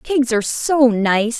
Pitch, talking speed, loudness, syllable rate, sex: 245 Hz, 175 wpm, -16 LUFS, 3.7 syllables/s, female